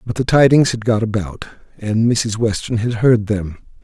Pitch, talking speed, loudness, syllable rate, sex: 115 Hz, 190 wpm, -16 LUFS, 4.8 syllables/s, male